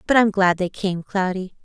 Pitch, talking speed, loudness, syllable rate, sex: 195 Hz, 220 wpm, -20 LUFS, 4.9 syllables/s, female